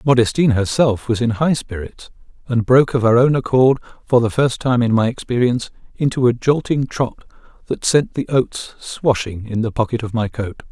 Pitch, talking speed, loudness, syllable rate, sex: 120 Hz, 190 wpm, -17 LUFS, 5.3 syllables/s, male